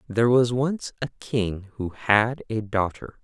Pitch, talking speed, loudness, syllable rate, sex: 115 Hz, 165 wpm, -24 LUFS, 3.9 syllables/s, male